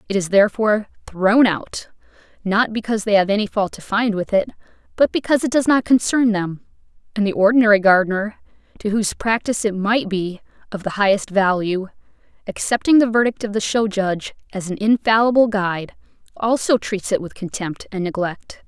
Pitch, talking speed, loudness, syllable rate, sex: 210 Hz, 175 wpm, -19 LUFS, 5.6 syllables/s, female